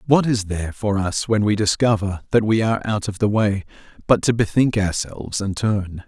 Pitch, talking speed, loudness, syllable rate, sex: 105 Hz, 210 wpm, -20 LUFS, 5.2 syllables/s, male